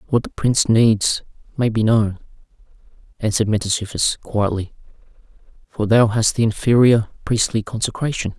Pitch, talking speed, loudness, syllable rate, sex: 110 Hz, 120 wpm, -18 LUFS, 5.0 syllables/s, male